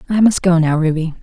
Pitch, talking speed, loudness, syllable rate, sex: 170 Hz, 245 wpm, -14 LUFS, 6.1 syllables/s, female